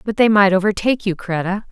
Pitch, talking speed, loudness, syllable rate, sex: 200 Hz, 210 wpm, -17 LUFS, 6.3 syllables/s, female